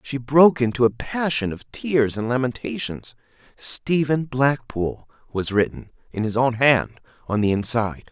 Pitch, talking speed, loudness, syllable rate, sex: 125 Hz, 150 wpm, -22 LUFS, 4.6 syllables/s, male